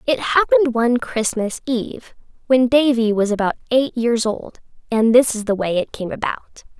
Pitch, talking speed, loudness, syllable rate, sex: 235 Hz, 175 wpm, -18 LUFS, 4.9 syllables/s, female